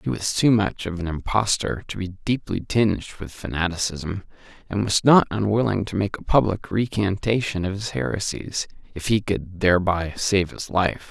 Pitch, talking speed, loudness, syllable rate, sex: 100 Hz, 175 wpm, -23 LUFS, 4.9 syllables/s, male